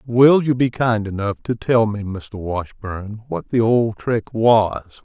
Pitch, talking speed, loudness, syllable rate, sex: 110 Hz, 180 wpm, -19 LUFS, 3.8 syllables/s, male